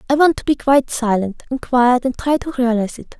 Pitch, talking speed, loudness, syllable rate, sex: 250 Hz, 245 wpm, -17 LUFS, 5.9 syllables/s, female